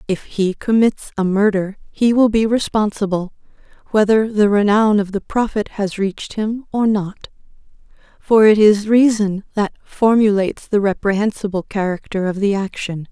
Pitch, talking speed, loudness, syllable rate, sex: 205 Hz, 145 wpm, -17 LUFS, 4.7 syllables/s, female